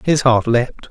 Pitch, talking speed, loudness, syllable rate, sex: 125 Hz, 200 wpm, -16 LUFS, 3.7 syllables/s, male